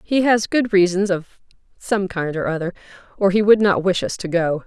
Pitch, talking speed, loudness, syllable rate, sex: 190 Hz, 220 wpm, -19 LUFS, 5.1 syllables/s, female